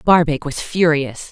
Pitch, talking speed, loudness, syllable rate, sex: 155 Hz, 135 wpm, -17 LUFS, 4.1 syllables/s, female